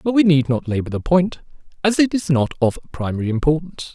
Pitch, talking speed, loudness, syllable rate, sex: 155 Hz, 215 wpm, -19 LUFS, 6.1 syllables/s, male